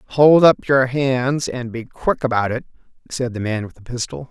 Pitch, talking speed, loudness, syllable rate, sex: 125 Hz, 210 wpm, -18 LUFS, 4.7 syllables/s, male